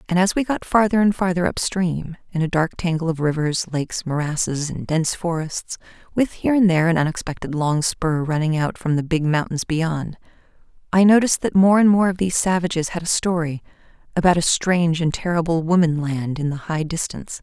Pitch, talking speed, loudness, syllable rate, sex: 170 Hz, 195 wpm, -20 LUFS, 5.6 syllables/s, female